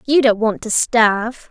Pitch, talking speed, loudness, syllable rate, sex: 230 Hz, 200 wpm, -16 LUFS, 4.4 syllables/s, female